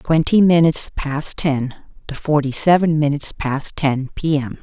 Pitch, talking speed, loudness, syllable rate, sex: 150 Hz, 155 wpm, -18 LUFS, 4.4 syllables/s, female